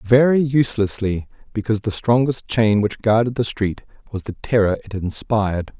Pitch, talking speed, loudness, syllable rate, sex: 110 Hz, 155 wpm, -20 LUFS, 5.1 syllables/s, male